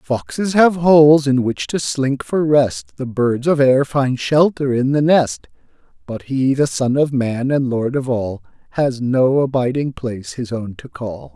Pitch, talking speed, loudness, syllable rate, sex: 130 Hz, 190 wpm, -17 LUFS, 4.0 syllables/s, male